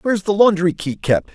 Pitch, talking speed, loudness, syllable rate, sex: 185 Hz, 220 wpm, -17 LUFS, 5.7 syllables/s, male